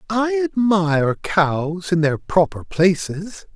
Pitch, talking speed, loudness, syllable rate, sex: 180 Hz, 120 wpm, -19 LUFS, 3.4 syllables/s, male